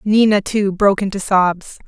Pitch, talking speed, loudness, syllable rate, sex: 200 Hz, 160 wpm, -16 LUFS, 4.7 syllables/s, female